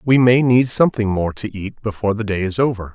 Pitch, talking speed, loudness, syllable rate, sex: 110 Hz, 245 wpm, -18 LUFS, 5.8 syllables/s, male